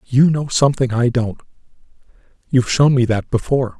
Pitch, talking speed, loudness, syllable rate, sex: 130 Hz, 160 wpm, -17 LUFS, 5.9 syllables/s, male